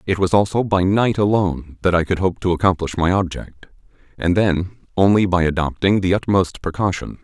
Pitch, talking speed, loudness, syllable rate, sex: 95 Hz, 185 wpm, -18 LUFS, 5.4 syllables/s, male